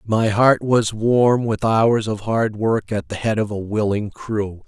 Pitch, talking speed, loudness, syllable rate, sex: 110 Hz, 205 wpm, -19 LUFS, 3.7 syllables/s, male